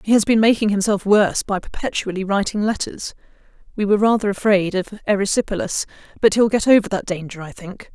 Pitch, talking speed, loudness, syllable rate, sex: 200 Hz, 180 wpm, -19 LUFS, 6.1 syllables/s, female